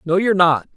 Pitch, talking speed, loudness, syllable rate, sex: 180 Hz, 235 wpm, -16 LUFS, 6.5 syllables/s, male